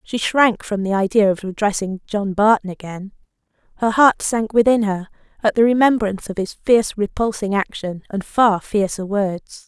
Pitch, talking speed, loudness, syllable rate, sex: 210 Hz, 170 wpm, -18 LUFS, 4.9 syllables/s, female